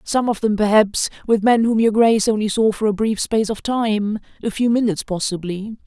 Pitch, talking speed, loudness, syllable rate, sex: 215 Hz, 205 wpm, -18 LUFS, 5.5 syllables/s, female